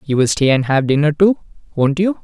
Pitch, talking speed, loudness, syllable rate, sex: 155 Hz, 240 wpm, -15 LUFS, 5.7 syllables/s, male